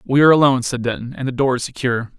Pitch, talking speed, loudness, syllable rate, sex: 130 Hz, 275 wpm, -17 LUFS, 7.9 syllables/s, male